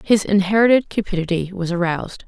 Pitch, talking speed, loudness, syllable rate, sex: 190 Hz, 130 wpm, -19 LUFS, 6.1 syllables/s, female